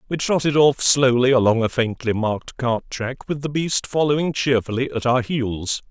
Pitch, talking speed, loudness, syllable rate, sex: 125 Hz, 185 wpm, -20 LUFS, 4.9 syllables/s, male